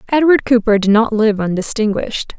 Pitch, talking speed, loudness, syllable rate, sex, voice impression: 225 Hz, 150 wpm, -14 LUFS, 5.6 syllables/s, female, feminine, adult-like, tensed, powerful, slightly bright, slightly clear, raspy, intellectual, elegant, lively, sharp